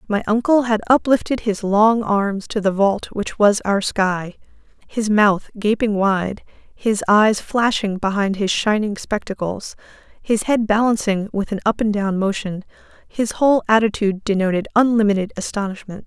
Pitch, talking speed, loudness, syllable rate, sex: 210 Hz, 150 wpm, -19 LUFS, 4.6 syllables/s, female